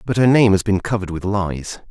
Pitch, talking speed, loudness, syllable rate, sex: 100 Hz, 250 wpm, -17 LUFS, 5.7 syllables/s, male